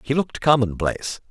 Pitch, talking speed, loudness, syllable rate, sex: 125 Hz, 140 wpm, -21 LUFS, 6.3 syllables/s, male